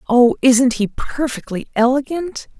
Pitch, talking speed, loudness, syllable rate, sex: 255 Hz, 115 wpm, -17 LUFS, 4.0 syllables/s, female